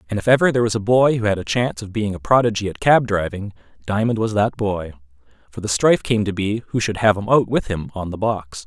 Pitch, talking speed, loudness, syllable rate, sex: 105 Hz, 265 wpm, -19 LUFS, 6.1 syllables/s, male